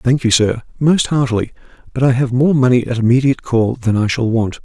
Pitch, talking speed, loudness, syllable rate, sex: 125 Hz, 220 wpm, -15 LUFS, 5.7 syllables/s, male